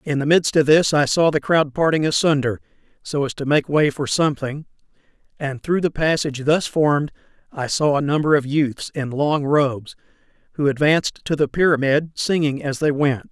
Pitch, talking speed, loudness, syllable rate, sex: 145 Hz, 190 wpm, -19 LUFS, 5.2 syllables/s, male